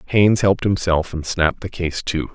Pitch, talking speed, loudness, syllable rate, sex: 90 Hz, 205 wpm, -19 LUFS, 5.4 syllables/s, male